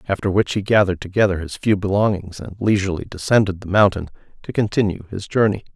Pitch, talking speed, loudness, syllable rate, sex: 95 Hz, 175 wpm, -19 LUFS, 6.5 syllables/s, male